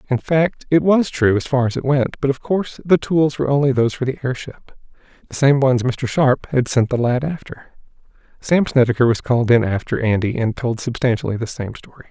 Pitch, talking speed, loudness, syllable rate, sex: 130 Hz, 220 wpm, -18 LUFS, 5.6 syllables/s, male